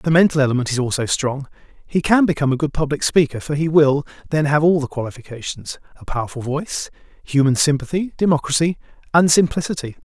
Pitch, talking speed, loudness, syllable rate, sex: 150 Hz, 170 wpm, -19 LUFS, 6.4 syllables/s, male